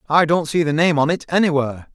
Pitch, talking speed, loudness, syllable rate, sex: 155 Hz, 245 wpm, -18 LUFS, 6.4 syllables/s, male